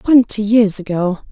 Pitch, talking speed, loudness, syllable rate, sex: 210 Hz, 135 wpm, -15 LUFS, 4.3 syllables/s, female